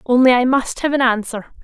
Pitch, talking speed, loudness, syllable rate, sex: 250 Hz, 220 wpm, -16 LUFS, 5.5 syllables/s, female